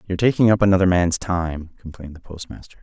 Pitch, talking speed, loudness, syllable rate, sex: 90 Hz, 190 wpm, -18 LUFS, 6.6 syllables/s, male